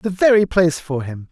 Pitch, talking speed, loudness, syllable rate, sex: 165 Hz, 230 wpm, -17 LUFS, 5.5 syllables/s, male